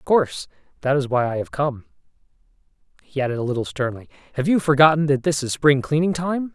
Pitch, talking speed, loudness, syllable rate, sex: 140 Hz, 200 wpm, -21 LUFS, 6.1 syllables/s, male